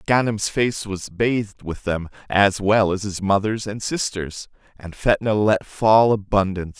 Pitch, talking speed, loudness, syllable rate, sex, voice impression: 100 Hz, 160 wpm, -21 LUFS, 4.2 syllables/s, male, very masculine, middle-aged, thick, very tensed, powerful, very bright, soft, very clear, very fluent, slightly raspy, cool, intellectual, very refreshing, sincere, calm, very mature, very friendly, very reassuring, unique, very elegant, wild, very sweet, lively, very kind, slightly modest